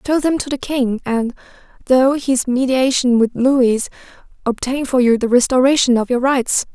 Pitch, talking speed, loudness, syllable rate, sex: 255 Hz, 170 wpm, -16 LUFS, 4.6 syllables/s, female